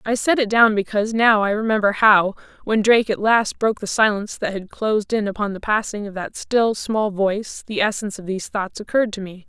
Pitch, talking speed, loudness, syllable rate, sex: 210 Hz, 230 wpm, -19 LUFS, 5.9 syllables/s, female